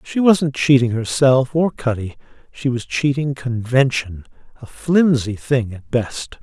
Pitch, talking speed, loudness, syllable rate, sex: 135 Hz, 140 wpm, -18 LUFS, 3.9 syllables/s, male